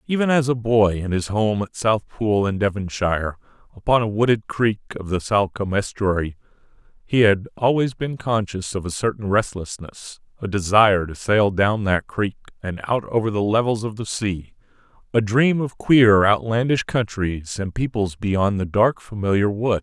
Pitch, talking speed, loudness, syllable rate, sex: 105 Hz, 170 wpm, -21 LUFS, 4.8 syllables/s, male